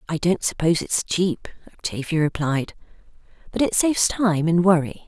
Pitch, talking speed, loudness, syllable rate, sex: 175 Hz, 155 wpm, -21 LUFS, 5.0 syllables/s, female